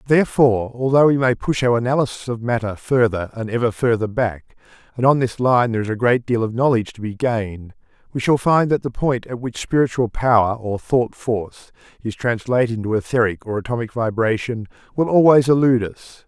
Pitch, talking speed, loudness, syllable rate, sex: 120 Hz, 185 wpm, -19 LUFS, 5.7 syllables/s, male